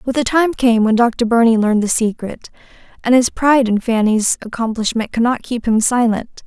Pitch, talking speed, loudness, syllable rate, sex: 235 Hz, 195 wpm, -15 LUFS, 5.2 syllables/s, female